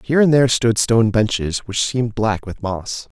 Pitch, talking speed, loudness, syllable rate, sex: 115 Hz, 205 wpm, -18 LUFS, 5.3 syllables/s, male